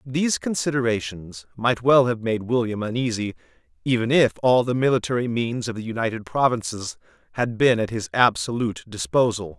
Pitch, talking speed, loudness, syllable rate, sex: 115 Hz, 150 wpm, -22 LUFS, 5.4 syllables/s, male